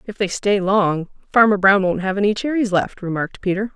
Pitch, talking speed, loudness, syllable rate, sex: 200 Hz, 210 wpm, -18 LUFS, 5.6 syllables/s, female